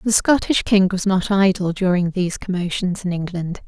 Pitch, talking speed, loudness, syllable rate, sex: 185 Hz, 180 wpm, -19 LUFS, 5.1 syllables/s, female